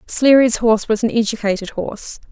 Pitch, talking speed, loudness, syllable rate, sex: 225 Hz, 155 wpm, -16 LUFS, 5.7 syllables/s, female